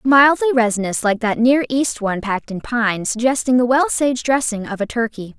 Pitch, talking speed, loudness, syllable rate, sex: 240 Hz, 200 wpm, -18 LUFS, 5.3 syllables/s, female